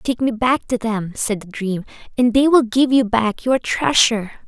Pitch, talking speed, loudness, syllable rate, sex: 230 Hz, 215 wpm, -18 LUFS, 4.5 syllables/s, female